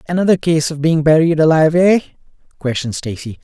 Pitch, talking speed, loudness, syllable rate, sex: 155 Hz, 155 wpm, -15 LUFS, 6.4 syllables/s, male